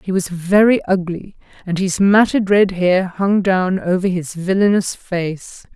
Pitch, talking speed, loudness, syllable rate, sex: 185 Hz, 155 wpm, -16 LUFS, 4.0 syllables/s, female